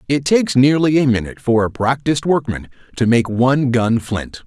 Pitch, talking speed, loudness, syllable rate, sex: 125 Hz, 190 wpm, -16 LUFS, 5.5 syllables/s, male